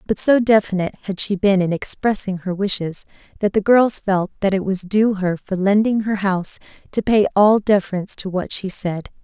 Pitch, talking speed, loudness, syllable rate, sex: 195 Hz, 200 wpm, -19 LUFS, 5.2 syllables/s, female